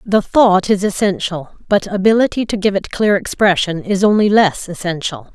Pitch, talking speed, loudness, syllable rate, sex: 195 Hz, 170 wpm, -15 LUFS, 4.9 syllables/s, female